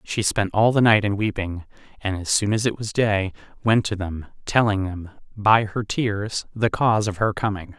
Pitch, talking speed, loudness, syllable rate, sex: 105 Hz, 210 wpm, -22 LUFS, 4.7 syllables/s, male